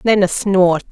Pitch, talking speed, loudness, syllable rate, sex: 190 Hz, 200 wpm, -15 LUFS, 3.9 syllables/s, female